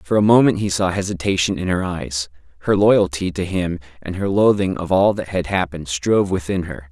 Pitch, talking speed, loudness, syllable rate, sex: 90 Hz, 210 wpm, -19 LUFS, 5.4 syllables/s, male